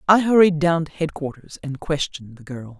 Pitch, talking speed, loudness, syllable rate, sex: 155 Hz, 195 wpm, -20 LUFS, 5.4 syllables/s, female